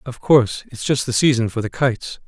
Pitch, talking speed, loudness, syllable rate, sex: 125 Hz, 240 wpm, -18 LUFS, 5.8 syllables/s, male